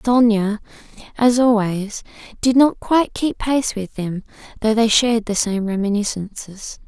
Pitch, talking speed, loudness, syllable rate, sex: 220 Hz, 140 wpm, -18 LUFS, 4.5 syllables/s, female